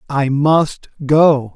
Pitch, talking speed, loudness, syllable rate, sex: 145 Hz, 115 wpm, -14 LUFS, 2.5 syllables/s, male